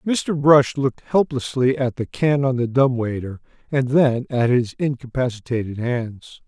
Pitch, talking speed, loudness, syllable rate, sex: 130 Hz, 160 wpm, -20 LUFS, 4.4 syllables/s, male